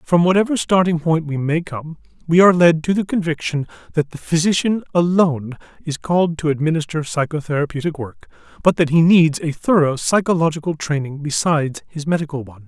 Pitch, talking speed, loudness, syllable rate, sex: 160 Hz, 165 wpm, -18 LUFS, 5.8 syllables/s, male